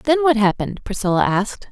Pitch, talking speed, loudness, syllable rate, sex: 225 Hz, 175 wpm, -19 LUFS, 6.3 syllables/s, female